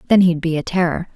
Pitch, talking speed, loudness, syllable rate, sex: 170 Hz, 260 wpm, -18 LUFS, 6.5 syllables/s, female